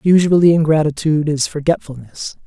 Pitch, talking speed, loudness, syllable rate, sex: 155 Hz, 100 wpm, -15 LUFS, 5.6 syllables/s, male